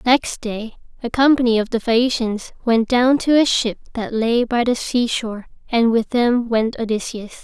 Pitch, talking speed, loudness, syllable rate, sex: 235 Hz, 180 wpm, -18 LUFS, 4.5 syllables/s, female